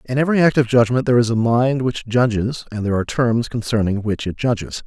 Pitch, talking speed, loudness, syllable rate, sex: 120 Hz, 235 wpm, -18 LUFS, 6.5 syllables/s, male